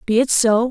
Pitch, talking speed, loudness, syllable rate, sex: 235 Hz, 255 wpm, -16 LUFS, 5.1 syllables/s, female